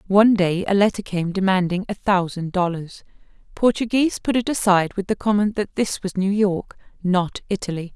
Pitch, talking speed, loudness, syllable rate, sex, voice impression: 195 Hz, 175 wpm, -21 LUFS, 5.3 syllables/s, female, feminine, very adult-like, slightly powerful, slightly fluent, intellectual, slightly strict